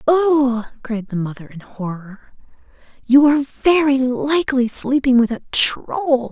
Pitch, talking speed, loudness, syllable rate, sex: 255 Hz, 135 wpm, -17 LUFS, 4.0 syllables/s, female